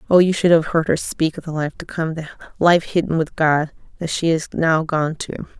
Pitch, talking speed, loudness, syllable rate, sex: 160 Hz, 235 wpm, -19 LUFS, 5.2 syllables/s, female